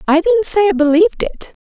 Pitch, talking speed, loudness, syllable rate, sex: 355 Hz, 220 wpm, -13 LUFS, 5.6 syllables/s, female